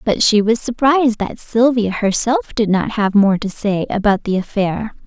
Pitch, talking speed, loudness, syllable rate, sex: 220 Hz, 190 wpm, -16 LUFS, 4.7 syllables/s, female